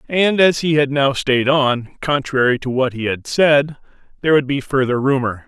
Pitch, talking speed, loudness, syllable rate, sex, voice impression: 135 Hz, 195 wpm, -17 LUFS, 4.8 syllables/s, male, masculine, adult-like, thick, tensed, slightly powerful, hard, fluent, slightly cool, intellectual, slightly friendly, unique, wild, lively, slightly kind